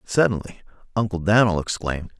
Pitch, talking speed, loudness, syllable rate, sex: 95 Hz, 110 wpm, -22 LUFS, 5.2 syllables/s, male